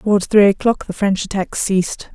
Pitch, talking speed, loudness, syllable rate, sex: 200 Hz, 195 wpm, -17 LUFS, 5.3 syllables/s, female